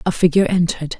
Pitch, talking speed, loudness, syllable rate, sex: 170 Hz, 180 wpm, -17 LUFS, 8.1 syllables/s, female